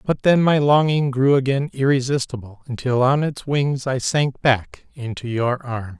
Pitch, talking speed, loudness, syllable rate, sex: 130 Hz, 170 wpm, -19 LUFS, 4.4 syllables/s, male